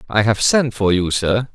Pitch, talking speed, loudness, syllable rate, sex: 110 Hz, 235 wpm, -17 LUFS, 4.5 syllables/s, male